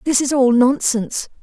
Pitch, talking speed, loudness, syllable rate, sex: 260 Hz, 170 wpm, -16 LUFS, 5.0 syllables/s, female